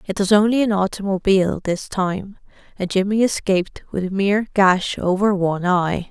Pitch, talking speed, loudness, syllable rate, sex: 195 Hz, 165 wpm, -19 LUFS, 5.1 syllables/s, female